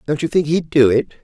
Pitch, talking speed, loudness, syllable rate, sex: 150 Hz, 290 wpm, -16 LUFS, 6.0 syllables/s, male